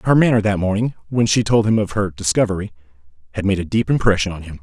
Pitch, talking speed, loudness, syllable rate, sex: 100 Hz, 235 wpm, -18 LUFS, 6.7 syllables/s, male